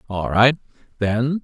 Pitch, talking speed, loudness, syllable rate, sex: 120 Hz, 125 wpm, -19 LUFS, 3.7 syllables/s, male